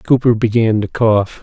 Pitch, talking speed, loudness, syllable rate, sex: 110 Hz, 170 wpm, -14 LUFS, 4.3 syllables/s, male